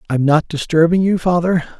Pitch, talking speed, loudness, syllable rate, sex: 165 Hz, 165 wpm, -15 LUFS, 5.4 syllables/s, male